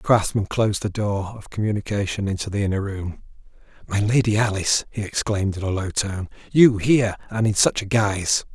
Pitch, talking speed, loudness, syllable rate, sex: 105 Hz, 190 wpm, -22 LUFS, 5.7 syllables/s, male